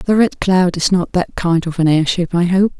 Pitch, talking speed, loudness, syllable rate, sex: 180 Hz, 255 wpm, -15 LUFS, 4.9 syllables/s, female